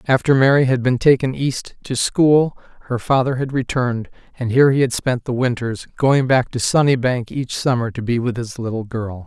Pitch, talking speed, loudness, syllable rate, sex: 125 Hz, 200 wpm, -18 LUFS, 5.1 syllables/s, male